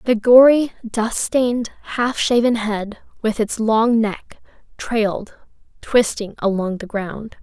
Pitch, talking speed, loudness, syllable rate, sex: 225 Hz, 130 wpm, -18 LUFS, 3.7 syllables/s, female